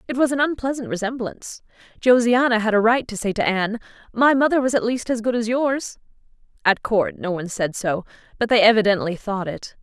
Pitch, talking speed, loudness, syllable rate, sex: 225 Hz, 200 wpm, -20 LUFS, 5.8 syllables/s, female